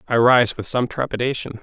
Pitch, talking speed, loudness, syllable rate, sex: 120 Hz, 185 wpm, -19 LUFS, 5.4 syllables/s, male